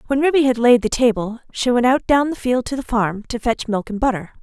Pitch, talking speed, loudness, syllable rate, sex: 245 Hz, 270 wpm, -18 LUFS, 5.7 syllables/s, female